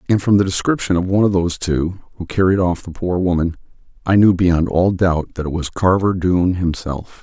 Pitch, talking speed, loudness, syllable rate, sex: 90 Hz, 215 wpm, -17 LUFS, 5.6 syllables/s, male